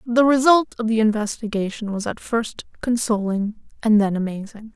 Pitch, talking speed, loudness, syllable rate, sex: 220 Hz, 150 wpm, -21 LUFS, 5.0 syllables/s, female